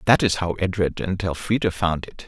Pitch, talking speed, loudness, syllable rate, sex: 90 Hz, 210 wpm, -23 LUFS, 5.2 syllables/s, male